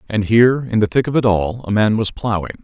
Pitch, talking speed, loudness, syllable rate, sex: 110 Hz, 275 wpm, -16 LUFS, 6.3 syllables/s, male